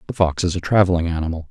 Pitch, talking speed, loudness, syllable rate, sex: 90 Hz, 240 wpm, -19 LUFS, 7.5 syllables/s, male